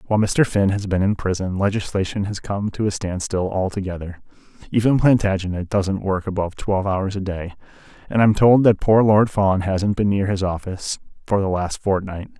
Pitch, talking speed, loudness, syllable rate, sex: 100 Hz, 190 wpm, -20 LUFS, 5.4 syllables/s, male